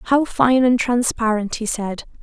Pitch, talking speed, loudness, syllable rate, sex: 235 Hz, 160 wpm, -19 LUFS, 3.9 syllables/s, female